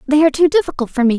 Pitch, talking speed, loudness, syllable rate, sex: 285 Hz, 305 wpm, -15 LUFS, 8.3 syllables/s, female